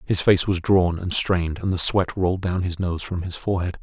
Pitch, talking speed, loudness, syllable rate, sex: 90 Hz, 250 wpm, -22 LUFS, 5.4 syllables/s, male